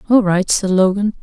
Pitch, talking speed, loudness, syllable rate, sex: 200 Hz, 195 wpm, -15 LUFS, 5.1 syllables/s, female